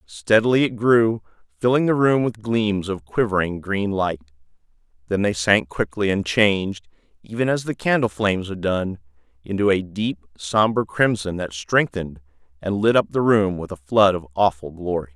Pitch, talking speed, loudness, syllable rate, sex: 100 Hz, 160 wpm, -21 LUFS, 4.9 syllables/s, male